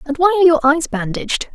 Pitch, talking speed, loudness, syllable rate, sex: 300 Hz, 235 wpm, -15 LUFS, 6.4 syllables/s, female